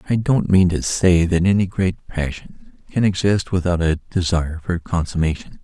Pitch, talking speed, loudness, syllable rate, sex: 90 Hz, 170 wpm, -19 LUFS, 4.8 syllables/s, male